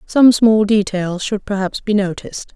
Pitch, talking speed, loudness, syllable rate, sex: 205 Hz, 165 wpm, -16 LUFS, 4.5 syllables/s, female